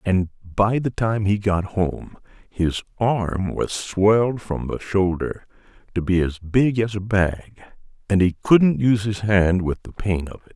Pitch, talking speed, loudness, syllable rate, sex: 100 Hz, 180 wpm, -21 LUFS, 4.2 syllables/s, male